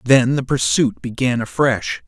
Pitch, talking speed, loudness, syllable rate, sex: 120 Hz, 145 wpm, -18 LUFS, 4.1 syllables/s, male